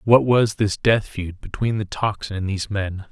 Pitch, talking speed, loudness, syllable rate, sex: 100 Hz, 210 wpm, -21 LUFS, 4.7 syllables/s, male